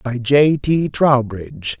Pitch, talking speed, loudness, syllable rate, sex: 130 Hz, 135 wpm, -16 LUFS, 3.6 syllables/s, male